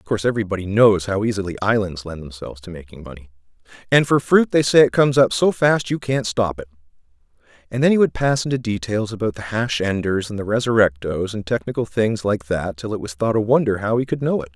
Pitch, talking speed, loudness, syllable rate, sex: 105 Hz, 225 wpm, -19 LUFS, 6.2 syllables/s, male